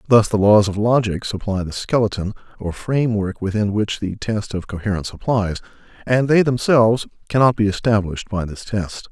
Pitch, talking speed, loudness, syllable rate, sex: 105 Hz, 170 wpm, -19 LUFS, 5.4 syllables/s, male